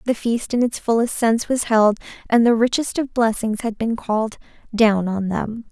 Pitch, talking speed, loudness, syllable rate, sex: 225 Hz, 200 wpm, -20 LUFS, 5.0 syllables/s, female